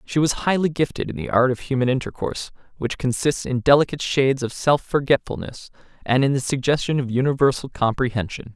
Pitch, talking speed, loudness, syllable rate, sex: 135 Hz, 175 wpm, -21 LUFS, 6.0 syllables/s, male